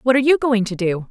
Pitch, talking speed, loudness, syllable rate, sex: 235 Hz, 325 wpm, -18 LUFS, 6.5 syllables/s, female